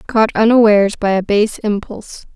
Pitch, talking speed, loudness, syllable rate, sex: 215 Hz, 155 wpm, -14 LUFS, 5.1 syllables/s, female